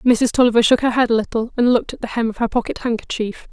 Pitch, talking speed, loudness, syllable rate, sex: 235 Hz, 275 wpm, -18 LUFS, 6.8 syllables/s, female